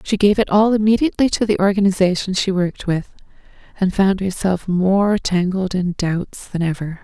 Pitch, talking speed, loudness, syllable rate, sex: 190 Hz, 170 wpm, -18 LUFS, 5.1 syllables/s, female